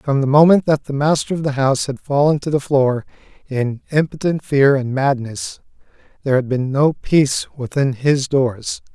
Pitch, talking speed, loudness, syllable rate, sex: 140 Hz, 180 wpm, -17 LUFS, 4.8 syllables/s, male